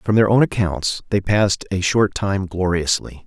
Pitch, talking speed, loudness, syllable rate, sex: 95 Hz, 185 wpm, -19 LUFS, 4.5 syllables/s, male